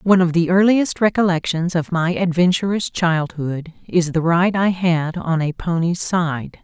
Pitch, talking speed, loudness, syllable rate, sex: 175 Hz, 165 wpm, -18 LUFS, 4.4 syllables/s, female